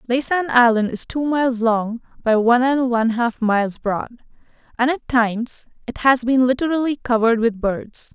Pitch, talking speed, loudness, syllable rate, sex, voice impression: 245 Hz, 170 wpm, -19 LUFS, 5.1 syllables/s, female, very feminine, young, very thin, tensed, powerful, bright, slightly hard, very clear, fluent, cute, very intellectual, refreshing, sincere, very calm, very friendly, reassuring, unique, very elegant, slightly wild, sweet, lively, strict, slightly intense, sharp, slightly modest, light